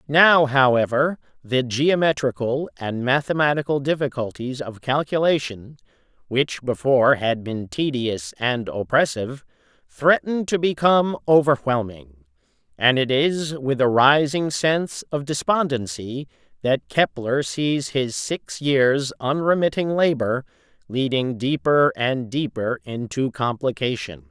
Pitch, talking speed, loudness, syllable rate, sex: 135 Hz, 105 wpm, -21 LUFS, 4.1 syllables/s, male